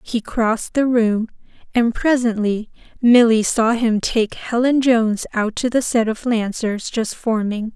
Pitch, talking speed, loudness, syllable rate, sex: 230 Hz, 155 wpm, -18 LUFS, 4.1 syllables/s, female